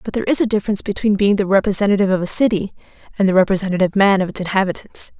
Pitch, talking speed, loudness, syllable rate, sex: 195 Hz, 220 wpm, -16 LUFS, 8.2 syllables/s, female